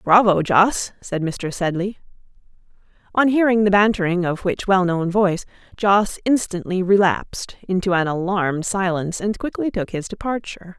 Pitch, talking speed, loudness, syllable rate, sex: 190 Hz, 140 wpm, -20 LUFS, 5.0 syllables/s, female